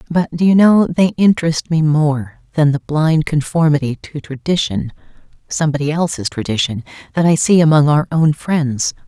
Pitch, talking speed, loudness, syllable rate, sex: 150 Hz, 145 wpm, -15 LUFS, 5.0 syllables/s, female